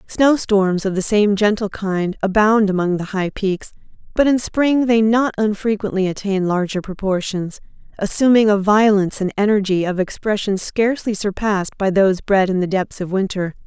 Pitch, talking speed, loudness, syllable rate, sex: 200 Hz, 160 wpm, -18 LUFS, 5.0 syllables/s, female